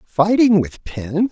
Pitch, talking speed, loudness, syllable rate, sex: 180 Hz, 135 wpm, -17 LUFS, 3.4 syllables/s, male